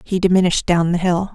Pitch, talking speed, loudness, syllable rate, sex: 180 Hz, 225 wpm, -17 LUFS, 6.4 syllables/s, female